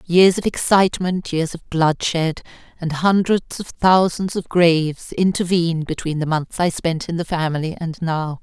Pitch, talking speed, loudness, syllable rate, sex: 170 Hz, 165 wpm, -19 LUFS, 4.6 syllables/s, female